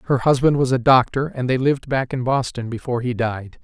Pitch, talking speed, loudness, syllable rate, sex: 125 Hz, 230 wpm, -20 LUFS, 5.8 syllables/s, male